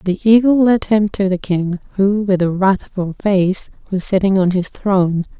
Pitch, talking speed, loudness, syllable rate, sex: 195 Hz, 190 wpm, -16 LUFS, 4.5 syllables/s, female